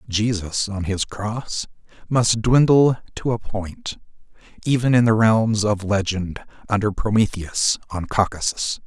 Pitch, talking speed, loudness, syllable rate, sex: 105 Hz, 130 wpm, -20 LUFS, 4.0 syllables/s, male